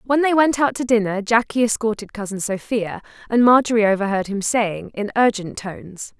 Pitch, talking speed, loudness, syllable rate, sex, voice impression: 220 Hz, 175 wpm, -19 LUFS, 5.2 syllables/s, female, feminine, adult-like, tensed, bright, fluent, intellectual, calm, friendly, reassuring, elegant, kind, slightly modest